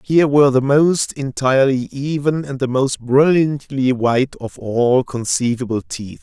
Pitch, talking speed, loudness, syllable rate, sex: 135 Hz, 145 wpm, -17 LUFS, 4.4 syllables/s, male